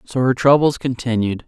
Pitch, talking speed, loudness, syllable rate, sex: 125 Hz, 165 wpm, -17 LUFS, 5.1 syllables/s, male